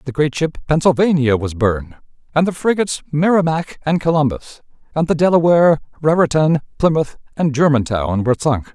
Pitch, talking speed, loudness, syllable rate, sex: 150 Hz, 145 wpm, -16 LUFS, 5.6 syllables/s, male